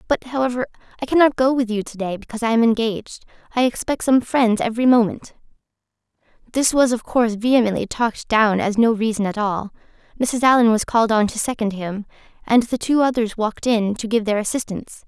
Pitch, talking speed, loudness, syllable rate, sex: 230 Hz, 190 wpm, -19 LUFS, 6.2 syllables/s, female